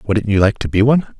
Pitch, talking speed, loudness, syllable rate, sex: 110 Hz, 305 wpm, -15 LUFS, 6.1 syllables/s, male